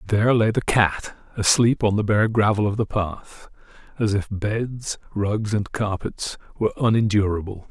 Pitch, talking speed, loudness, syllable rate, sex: 105 Hz, 155 wpm, -22 LUFS, 4.4 syllables/s, male